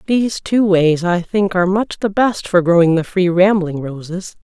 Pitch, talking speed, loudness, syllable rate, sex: 185 Hz, 200 wpm, -15 LUFS, 4.8 syllables/s, female